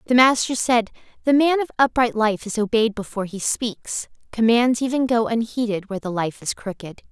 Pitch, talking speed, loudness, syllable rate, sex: 230 Hz, 185 wpm, -21 LUFS, 5.2 syllables/s, female